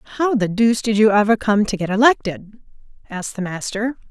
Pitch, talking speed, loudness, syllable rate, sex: 215 Hz, 190 wpm, -18 LUFS, 6.2 syllables/s, female